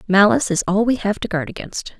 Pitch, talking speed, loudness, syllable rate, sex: 185 Hz, 240 wpm, -19 LUFS, 6.2 syllables/s, female